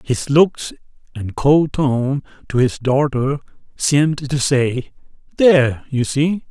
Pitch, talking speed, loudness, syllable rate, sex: 140 Hz, 130 wpm, -17 LUFS, 3.5 syllables/s, male